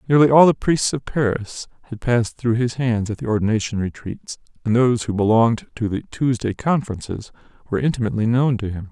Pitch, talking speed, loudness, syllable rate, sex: 115 Hz, 190 wpm, -20 LUFS, 6.1 syllables/s, male